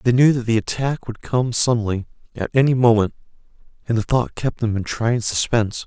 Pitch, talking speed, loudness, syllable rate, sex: 120 Hz, 195 wpm, -20 LUFS, 5.5 syllables/s, male